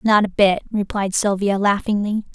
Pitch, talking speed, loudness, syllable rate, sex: 205 Hz, 155 wpm, -19 LUFS, 4.8 syllables/s, female